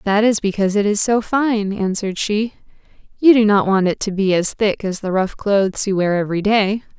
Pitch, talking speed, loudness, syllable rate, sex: 205 Hz, 225 wpm, -17 LUFS, 5.4 syllables/s, female